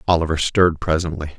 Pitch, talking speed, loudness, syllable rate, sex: 80 Hz, 130 wpm, -19 LUFS, 6.7 syllables/s, male